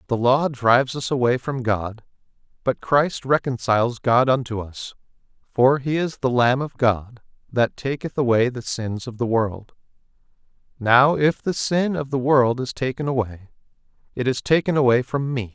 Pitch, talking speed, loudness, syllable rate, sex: 125 Hz, 170 wpm, -21 LUFS, 4.6 syllables/s, male